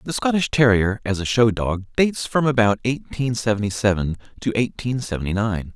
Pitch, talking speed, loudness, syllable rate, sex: 110 Hz, 175 wpm, -21 LUFS, 5.3 syllables/s, male